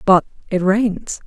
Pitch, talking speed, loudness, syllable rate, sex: 195 Hz, 140 wpm, -18 LUFS, 3.3 syllables/s, female